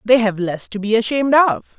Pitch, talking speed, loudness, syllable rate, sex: 225 Hz, 235 wpm, -17 LUFS, 5.3 syllables/s, female